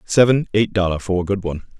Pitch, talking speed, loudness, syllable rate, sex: 100 Hz, 165 wpm, -19 LUFS, 5.9 syllables/s, male